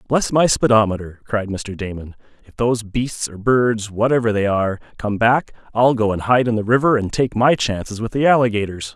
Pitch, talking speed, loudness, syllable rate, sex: 115 Hz, 190 wpm, -18 LUFS, 5.3 syllables/s, male